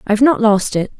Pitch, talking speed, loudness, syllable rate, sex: 225 Hz, 240 wpm, -14 LUFS, 6.0 syllables/s, female